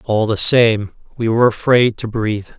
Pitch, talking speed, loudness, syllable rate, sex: 110 Hz, 185 wpm, -15 LUFS, 5.0 syllables/s, male